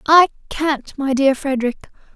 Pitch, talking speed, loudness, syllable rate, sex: 280 Hz, 140 wpm, -18 LUFS, 4.5 syllables/s, female